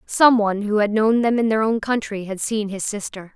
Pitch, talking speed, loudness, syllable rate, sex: 215 Hz, 250 wpm, -20 LUFS, 5.3 syllables/s, female